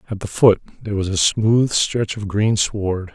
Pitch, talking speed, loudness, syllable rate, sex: 105 Hz, 210 wpm, -18 LUFS, 4.4 syllables/s, male